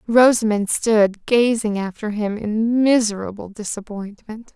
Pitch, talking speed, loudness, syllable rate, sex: 215 Hz, 105 wpm, -19 LUFS, 4.1 syllables/s, female